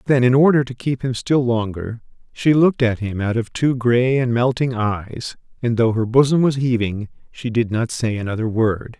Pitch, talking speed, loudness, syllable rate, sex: 120 Hz, 205 wpm, -19 LUFS, 4.9 syllables/s, male